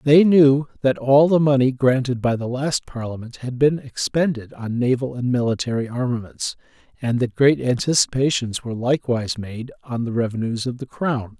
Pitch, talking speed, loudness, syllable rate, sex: 125 Hz, 170 wpm, -20 LUFS, 5.1 syllables/s, male